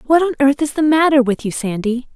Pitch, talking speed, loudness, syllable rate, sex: 275 Hz, 250 wpm, -16 LUFS, 5.7 syllables/s, female